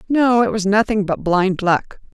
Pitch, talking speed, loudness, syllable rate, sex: 205 Hz, 190 wpm, -17 LUFS, 4.3 syllables/s, female